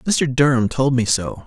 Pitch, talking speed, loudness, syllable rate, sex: 130 Hz, 205 wpm, -18 LUFS, 4.2 syllables/s, male